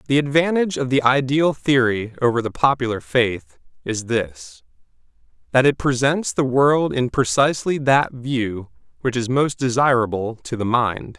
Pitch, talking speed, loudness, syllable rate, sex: 125 Hz, 150 wpm, -19 LUFS, 4.5 syllables/s, male